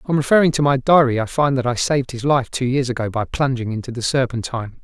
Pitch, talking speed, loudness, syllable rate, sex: 130 Hz, 250 wpm, -19 LUFS, 6.3 syllables/s, male